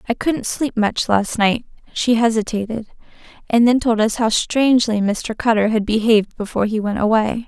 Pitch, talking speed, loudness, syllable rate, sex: 225 Hz, 185 wpm, -18 LUFS, 5.4 syllables/s, female